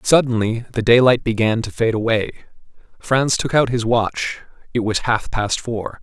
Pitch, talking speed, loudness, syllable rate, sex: 115 Hz, 160 wpm, -18 LUFS, 4.5 syllables/s, male